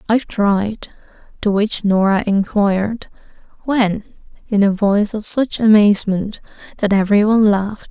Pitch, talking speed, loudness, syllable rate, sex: 205 Hz, 130 wpm, -16 LUFS, 5.0 syllables/s, female